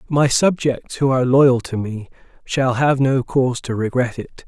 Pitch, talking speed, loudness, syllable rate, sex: 130 Hz, 190 wpm, -18 LUFS, 4.6 syllables/s, male